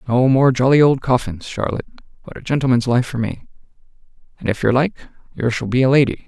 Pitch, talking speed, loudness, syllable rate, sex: 125 Hz, 200 wpm, -17 LUFS, 6.1 syllables/s, male